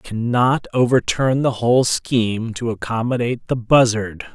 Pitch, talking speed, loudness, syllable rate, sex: 120 Hz, 140 wpm, -18 LUFS, 5.0 syllables/s, male